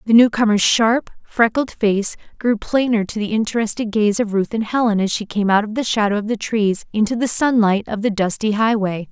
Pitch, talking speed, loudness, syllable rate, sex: 215 Hz, 210 wpm, -18 LUFS, 5.3 syllables/s, female